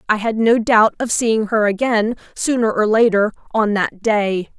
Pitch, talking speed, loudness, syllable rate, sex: 220 Hz, 185 wpm, -17 LUFS, 4.3 syllables/s, female